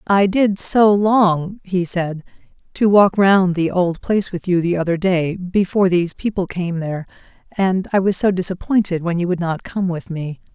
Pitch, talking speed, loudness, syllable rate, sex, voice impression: 185 Hz, 195 wpm, -18 LUFS, 4.8 syllables/s, female, feminine, middle-aged, tensed, slightly weak, soft, clear, intellectual, slightly friendly, reassuring, elegant, lively, kind, slightly sharp